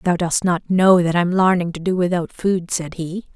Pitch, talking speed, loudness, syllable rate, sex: 175 Hz, 230 wpm, -18 LUFS, 4.7 syllables/s, female